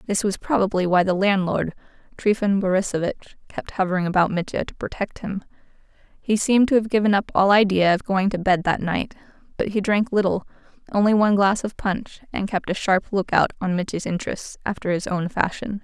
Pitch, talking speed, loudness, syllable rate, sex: 195 Hz, 195 wpm, -22 LUFS, 5.7 syllables/s, female